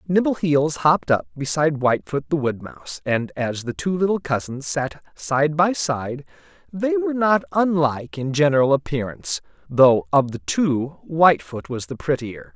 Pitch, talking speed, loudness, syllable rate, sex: 140 Hz, 160 wpm, -21 LUFS, 4.9 syllables/s, male